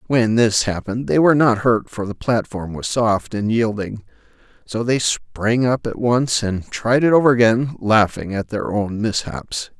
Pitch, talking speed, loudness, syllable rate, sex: 110 Hz, 185 wpm, -19 LUFS, 4.4 syllables/s, male